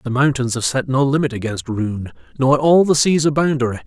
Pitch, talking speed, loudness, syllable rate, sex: 135 Hz, 215 wpm, -17 LUFS, 5.4 syllables/s, male